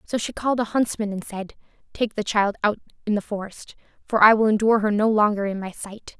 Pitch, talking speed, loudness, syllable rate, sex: 210 Hz, 235 wpm, -22 LUFS, 5.9 syllables/s, female